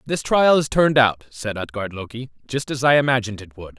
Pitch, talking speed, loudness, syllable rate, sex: 125 Hz, 220 wpm, -19 LUFS, 5.9 syllables/s, male